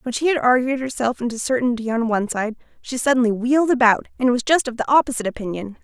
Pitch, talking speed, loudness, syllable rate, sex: 245 Hz, 215 wpm, -20 LUFS, 6.8 syllables/s, female